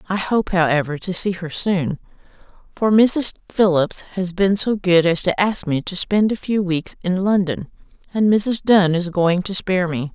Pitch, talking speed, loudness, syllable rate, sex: 185 Hz, 195 wpm, -19 LUFS, 4.4 syllables/s, female